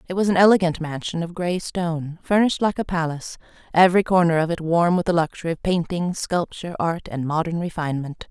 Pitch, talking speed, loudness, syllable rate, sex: 170 Hz, 195 wpm, -21 LUFS, 6.1 syllables/s, female